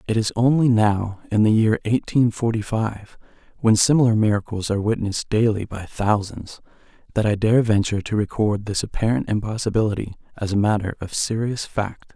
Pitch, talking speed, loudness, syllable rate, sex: 110 Hz, 165 wpm, -21 LUFS, 5.4 syllables/s, male